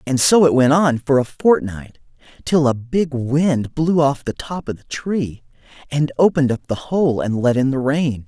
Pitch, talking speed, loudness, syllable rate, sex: 140 Hz, 215 wpm, -18 LUFS, 4.5 syllables/s, male